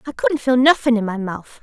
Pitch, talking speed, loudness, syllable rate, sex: 240 Hz, 260 wpm, -18 LUFS, 5.4 syllables/s, female